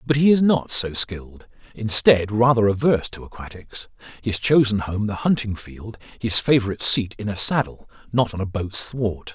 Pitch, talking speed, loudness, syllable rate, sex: 110 Hz, 165 wpm, -21 LUFS, 5.0 syllables/s, male